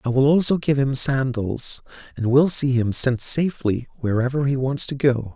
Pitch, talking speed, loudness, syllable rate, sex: 130 Hz, 190 wpm, -20 LUFS, 4.8 syllables/s, male